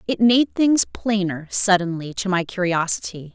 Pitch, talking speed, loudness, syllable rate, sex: 195 Hz, 145 wpm, -20 LUFS, 4.4 syllables/s, female